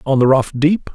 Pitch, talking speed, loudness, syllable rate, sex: 145 Hz, 255 wpm, -15 LUFS, 4.9 syllables/s, male